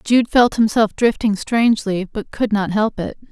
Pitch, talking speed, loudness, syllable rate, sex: 215 Hz, 180 wpm, -17 LUFS, 4.6 syllables/s, female